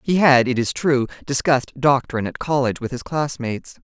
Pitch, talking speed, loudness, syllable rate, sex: 135 Hz, 200 wpm, -20 LUFS, 5.8 syllables/s, female